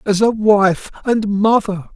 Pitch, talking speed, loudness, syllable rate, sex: 205 Hz, 155 wpm, -16 LUFS, 3.6 syllables/s, male